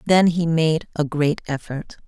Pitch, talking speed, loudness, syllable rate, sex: 160 Hz, 175 wpm, -21 LUFS, 4.2 syllables/s, female